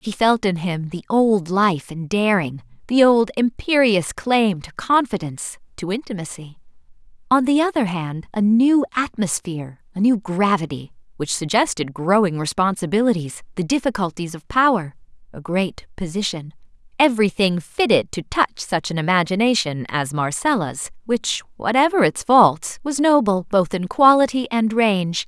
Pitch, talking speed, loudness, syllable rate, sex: 200 Hz, 135 wpm, -19 LUFS, 4.7 syllables/s, female